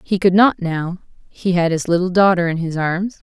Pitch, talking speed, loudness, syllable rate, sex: 180 Hz, 220 wpm, -17 LUFS, 4.9 syllables/s, female